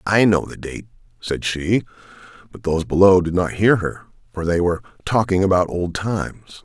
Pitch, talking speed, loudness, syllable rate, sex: 95 Hz, 180 wpm, -19 LUFS, 5.5 syllables/s, male